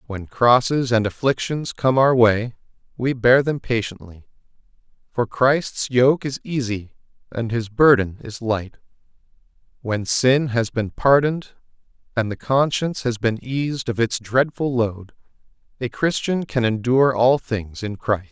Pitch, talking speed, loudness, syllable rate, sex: 120 Hz, 145 wpm, -20 LUFS, 4.2 syllables/s, male